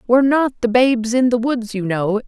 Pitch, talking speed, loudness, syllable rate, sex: 235 Hz, 235 wpm, -17 LUFS, 5.5 syllables/s, female